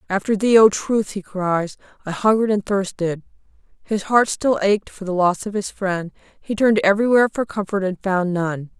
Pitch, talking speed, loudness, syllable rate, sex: 200 Hz, 190 wpm, -19 LUFS, 5.1 syllables/s, female